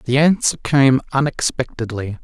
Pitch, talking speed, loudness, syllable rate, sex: 130 Hz, 110 wpm, -17 LUFS, 4.4 syllables/s, male